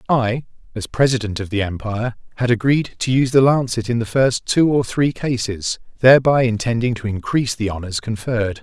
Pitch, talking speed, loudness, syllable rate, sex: 120 Hz, 180 wpm, -18 LUFS, 5.6 syllables/s, male